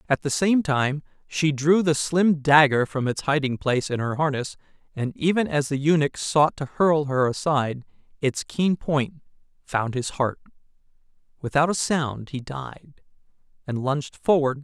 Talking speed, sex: 175 wpm, male